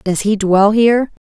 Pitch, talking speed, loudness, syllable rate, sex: 210 Hz, 190 wpm, -13 LUFS, 4.5 syllables/s, female